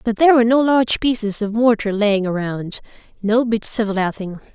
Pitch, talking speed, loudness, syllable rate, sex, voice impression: 220 Hz, 170 wpm, -17 LUFS, 5.6 syllables/s, female, very gender-neutral, young, very thin, very tensed, slightly powerful, slightly dark, soft, very clear, very fluent, very cute, very intellectual, very refreshing, sincere, calm, very friendly, very reassuring, very unique, very elegant, slightly wild, very sweet, lively, slightly strict, slightly intense, sharp, slightly modest, very light